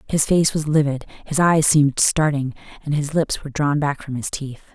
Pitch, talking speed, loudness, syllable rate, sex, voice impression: 145 Hz, 215 wpm, -20 LUFS, 5.3 syllables/s, female, feminine, very adult-like, slightly soft, slightly intellectual, calm, slightly elegant, slightly sweet